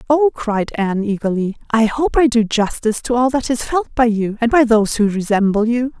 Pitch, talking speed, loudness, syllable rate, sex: 230 Hz, 220 wpm, -17 LUFS, 5.4 syllables/s, female